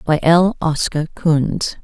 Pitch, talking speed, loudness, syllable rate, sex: 160 Hz, 130 wpm, -16 LUFS, 3.3 syllables/s, female